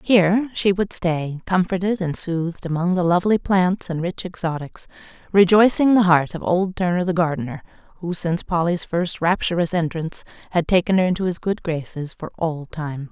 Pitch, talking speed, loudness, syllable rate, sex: 175 Hz, 175 wpm, -20 LUFS, 5.2 syllables/s, female